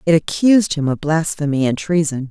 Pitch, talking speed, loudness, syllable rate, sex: 160 Hz, 180 wpm, -17 LUFS, 5.5 syllables/s, female